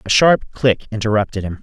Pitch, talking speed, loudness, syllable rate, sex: 110 Hz, 185 wpm, -17 LUFS, 5.3 syllables/s, male